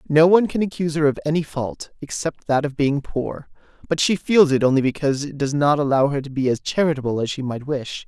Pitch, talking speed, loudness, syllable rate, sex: 145 Hz, 240 wpm, -20 LUFS, 6.0 syllables/s, male